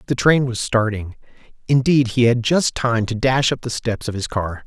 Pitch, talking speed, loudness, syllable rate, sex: 120 Hz, 220 wpm, -19 LUFS, 4.8 syllables/s, male